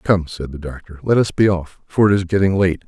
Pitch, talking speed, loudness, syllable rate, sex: 90 Hz, 270 wpm, -18 LUFS, 5.5 syllables/s, male